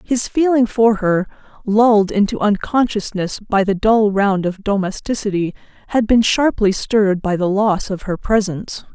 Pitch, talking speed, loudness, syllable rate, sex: 210 Hz, 155 wpm, -17 LUFS, 4.6 syllables/s, female